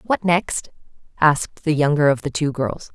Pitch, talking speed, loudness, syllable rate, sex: 150 Hz, 185 wpm, -20 LUFS, 4.7 syllables/s, female